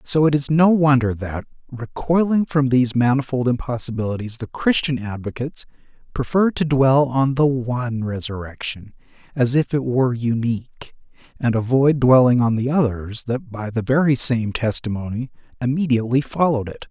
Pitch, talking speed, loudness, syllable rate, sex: 130 Hz, 145 wpm, -20 LUFS, 5.3 syllables/s, male